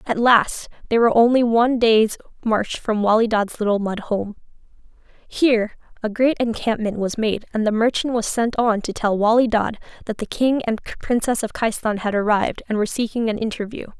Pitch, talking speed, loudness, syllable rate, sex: 225 Hz, 190 wpm, -20 LUFS, 5.3 syllables/s, female